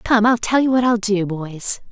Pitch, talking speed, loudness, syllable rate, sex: 215 Hz, 250 wpm, -18 LUFS, 4.6 syllables/s, female